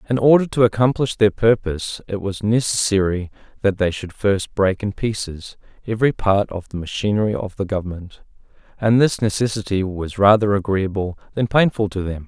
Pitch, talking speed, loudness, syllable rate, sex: 105 Hz, 165 wpm, -19 LUFS, 5.3 syllables/s, male